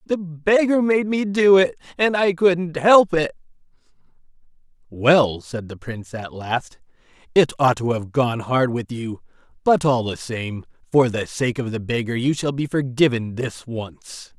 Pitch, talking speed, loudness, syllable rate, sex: 145 Hz, 170 wpm, -20 LUFS, 4.1 syllables/s, male